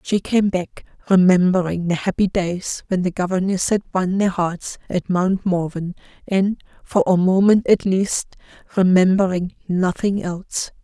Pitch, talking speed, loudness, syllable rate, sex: 185 Hz, 145 wpm, -19 LUFS, 4.3 syllables/s, female